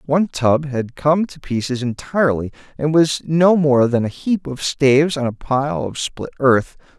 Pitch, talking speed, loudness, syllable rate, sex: 140 Hz, 190 wpm, -18 LUFS, 4.5 syllables/s, male